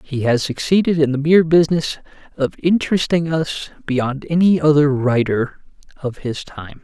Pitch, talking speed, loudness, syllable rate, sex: 150 Hz, 150 wpm, -18 LUFS, 4.8 syllables/s, male